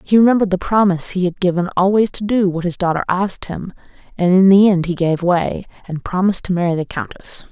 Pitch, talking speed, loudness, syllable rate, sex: 185 Hz, 225 wpm, -16 LUFS, 6.1 syllables/s, female